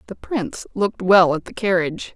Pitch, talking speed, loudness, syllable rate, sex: 185 Hz, 195 wpm, -20 LUFS, 5.8 syllables/s, female